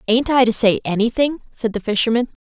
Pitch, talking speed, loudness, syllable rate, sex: 235 Hz, 195 wpm, -18 LUFS, 5.8 syllables/s, female